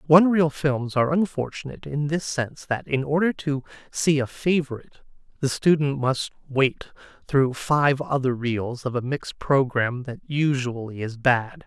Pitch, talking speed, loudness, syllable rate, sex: 140 Hz, 160 wpm, -24 LUFS, 4.8 syllables/s, male